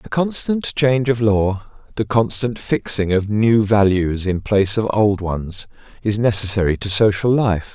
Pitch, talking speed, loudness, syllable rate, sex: 105 Hz, 165 wpm, -18 LUFS, 4.4 syllables/s, male